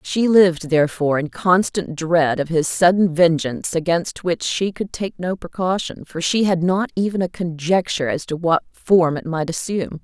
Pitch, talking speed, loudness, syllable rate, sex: 170 Hz, 185 wpm, -19 LUFS, 4.9 syllables/s, female